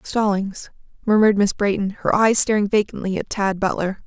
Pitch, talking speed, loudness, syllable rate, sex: 205 Hz, 160 wpm, -19 LUFS, 5.2 syllables/s, female